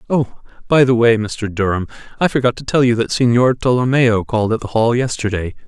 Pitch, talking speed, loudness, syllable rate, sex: 120 Hz, 200 wpm, -16 LUFS, 5.8 syllables/s, male